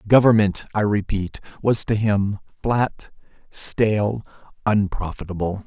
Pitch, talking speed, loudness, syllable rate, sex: 100 Hz, 95 wpm, -21 LUFS, 4.0 syllables/s, male